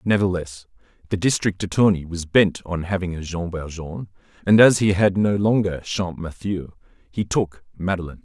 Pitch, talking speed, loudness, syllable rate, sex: 95 Hz, 155 wpm, -21 LUFS, 5.1 syllables/s, male